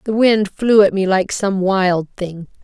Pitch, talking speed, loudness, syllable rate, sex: 195 Hz, 205 wpm, -16 LUFS, 4.0 syllables/s, female